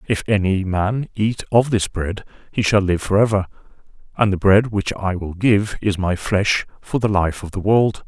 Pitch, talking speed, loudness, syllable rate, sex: 100 Hz, 200 wpm, -19 LUFS, 4.6 syllables/s, male